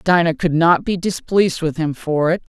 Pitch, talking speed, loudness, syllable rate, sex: 170 Hz, 210 wpm, -18 LUFS, 5.1 syllables/s, female